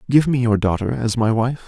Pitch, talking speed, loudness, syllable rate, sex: 115 Hz, 250 wpm, -19 LUFS, 5.7 syllables/s, male